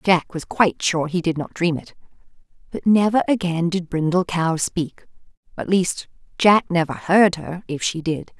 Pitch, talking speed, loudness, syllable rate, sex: 175 Hz, 170 wpm, -20 LUFS, 4.5 syllables/s, female